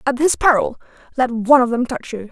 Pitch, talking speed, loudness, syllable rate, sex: 250 Hz, 235 wpm, -17 LUFS, 6.1 syllables/s, female